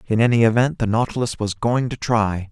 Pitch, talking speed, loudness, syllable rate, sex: 115 Hz, 215 wpm, -20 LUFS, 5.5 syllables/s, male